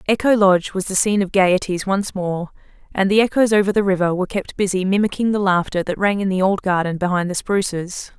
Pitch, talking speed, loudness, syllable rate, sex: 190 Hz, 220 wpm, -18 LUFS, 5.9 syllables/s, female